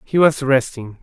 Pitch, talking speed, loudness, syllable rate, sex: 135 Hz, 175 wpm, -16 LUFS, 4.3 syllables/s, male